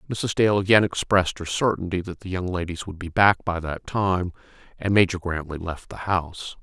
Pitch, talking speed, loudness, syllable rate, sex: 90 Hz, 200 wpm, -23 LUFS, 5.3 syllables/s, male